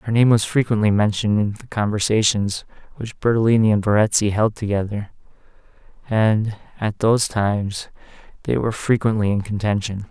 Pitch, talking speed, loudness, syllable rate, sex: 105 Hz, 135 wpm, -20 LUFS, 5.5 syllables/s, male